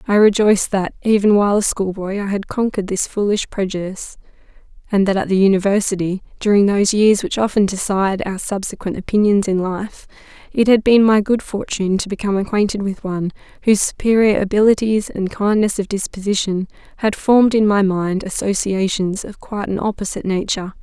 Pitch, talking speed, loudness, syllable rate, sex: 200 Hz, 165 wpm, -17 LUFS, 5.9 syllables/s, female